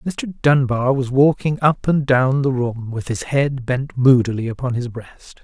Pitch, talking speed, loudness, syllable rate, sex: 130 Hz, 190 wpm, -18 LUFS, 4.1 syllables/s, male